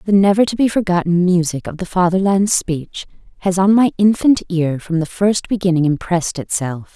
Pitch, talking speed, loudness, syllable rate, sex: 185 Hz, 180 wpm, -16 LUFS, 5.2 syllables/s, female